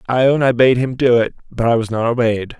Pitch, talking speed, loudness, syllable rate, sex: 120 Hz, 275 wpm, -16 LUFS, 5.8 syllables/s, male